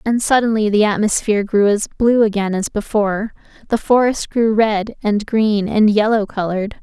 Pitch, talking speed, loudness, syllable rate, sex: 210 Hz, 165 wpm, -16 LUFS, 5.1 syllables/s, female